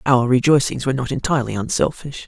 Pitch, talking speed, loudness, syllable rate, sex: 130 Hz, 160 wpm, -19 LUFS, 6.5 syllables/s, male